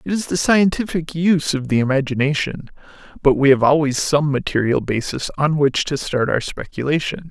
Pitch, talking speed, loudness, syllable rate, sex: 145 Hz, 175 wpm, -18 LUFS, 5.3 syllables/s, male